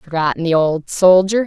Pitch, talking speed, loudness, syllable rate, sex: 175 Hz, 165 wpm, -15 LUFS, 4.9 syllables/s, female